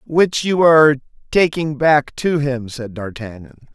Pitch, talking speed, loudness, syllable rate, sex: 140 Hz, 145 wpm, -16 LUFS, 3.7 syllables/s, male